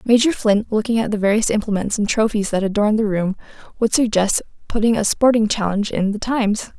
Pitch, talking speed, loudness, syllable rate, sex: 215 Hz, 195 wpm, -18 LUFS, 6.1 syllables/s, female